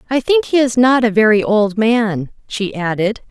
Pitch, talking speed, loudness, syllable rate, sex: 225 Hz, 200 wpm, -15 LUFS, 4.5 syllables/s, female